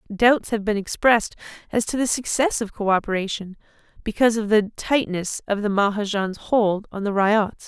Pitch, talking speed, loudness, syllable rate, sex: 210 Hz, 165 wpm, -21 LUFS, 5.1 syllables/s, female